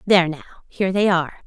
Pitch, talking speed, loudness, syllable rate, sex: 175 Hz, 205 wpm, -20 LUFS, 7.8 syllables/s, female